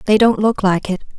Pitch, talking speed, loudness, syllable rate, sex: 205 Hz, 255 wpm, -16 LUFS, 5.4 syllables/s, female